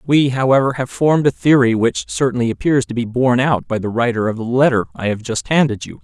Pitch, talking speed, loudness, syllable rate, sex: 125 Hz, 240 wpm, -16 LUFS, 6.1 syllables/s, male